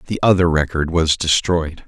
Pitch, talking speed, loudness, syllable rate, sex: 85 Hz, 160 wpm, -17 LUFS, 4.8 syllables/s, male